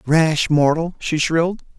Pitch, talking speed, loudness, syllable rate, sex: 160 Hz, 135 wpm, -18 LUFS, 4.0 syllables/s, male